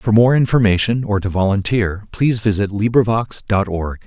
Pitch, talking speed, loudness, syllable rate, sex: 105 Hz, 160 wpm, -17 LUFS, 5.1 syllables/s, male